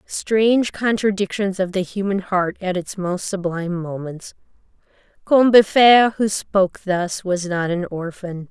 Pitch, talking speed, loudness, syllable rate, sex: 190 Hz, 135 wpm, -19 LUFS, 4.3 syllables/s, female